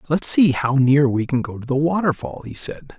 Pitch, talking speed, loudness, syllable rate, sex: 140 Hz, 240 wpm, -19 LUFS, 5.1 syllables/s, male